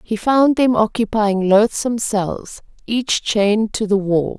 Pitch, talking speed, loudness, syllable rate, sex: 215 Hz, 150 wpm, -17 LUFS, 3.9 syllables/s, female